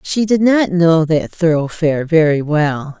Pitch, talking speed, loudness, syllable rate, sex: 165 Hz, 160 wpm, -14 LUFS, 4.2 syllables/s, female